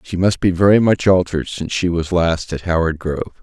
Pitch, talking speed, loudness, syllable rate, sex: 85 Hz, 230 wpm, -17 LUFS, 5.9 syllables/s, male